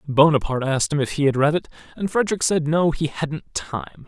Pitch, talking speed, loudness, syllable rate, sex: 145 Hz, 220 wpm, -21 LUFS, 5.8 syllables/s, male